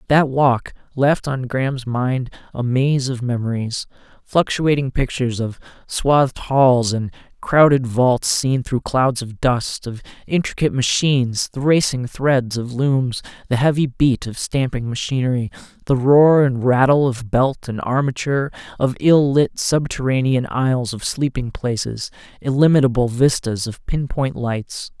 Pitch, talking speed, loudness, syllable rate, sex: 130 Hz, 140 wpm, -18 LUFS, 4.3 syllables/s, male